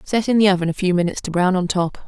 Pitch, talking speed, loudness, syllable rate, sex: 185 Hz, 320 wpm, -19 LUFS, 7.1 syllables/s, female